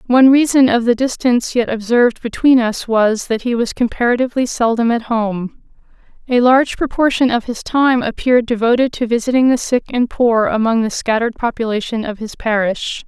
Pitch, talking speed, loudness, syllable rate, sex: 235 Hz, 175 wpm, -15 LUFS, 5.5 syllables/s, female